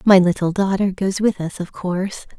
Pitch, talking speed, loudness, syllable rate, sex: 190 Hz, 200 wpm, -19 LUFS, 5.0 syllables/s, female